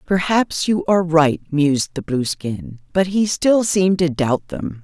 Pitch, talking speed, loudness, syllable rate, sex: 165 Hz, 175 wpm, -18 LUFS, 4.3 syllables/s, female